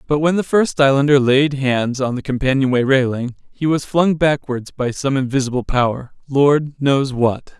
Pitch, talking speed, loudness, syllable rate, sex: 135 Hz, 175 wpm, -17 LUFS, 4.7 syllables/s, male